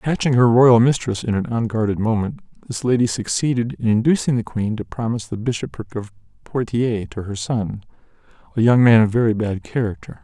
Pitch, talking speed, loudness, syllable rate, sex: 115 Hz, 180 wpm, -19 LUFS, 5.6 syllables/s, male